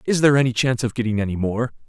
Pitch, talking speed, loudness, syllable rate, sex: 120 Hz, 255 wpm, -20 LUFS, 7.9 syllables/s, male